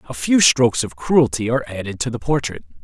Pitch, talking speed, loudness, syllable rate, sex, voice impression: 120 Hz, 210 wpm, -18 LUFS, 6.0 syllables/s, male, masculine, adult-like, slightly thick, slightly refreshing, sincere, friendly